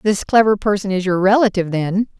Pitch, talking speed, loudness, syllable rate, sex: 200 Hz, 190 wpm, -16 LUFS, 6.0 syllables/s, female